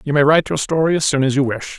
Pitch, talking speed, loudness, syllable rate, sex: 145 Hz, 335 wpm, -16 LUFS, 7.1 syllables/s, male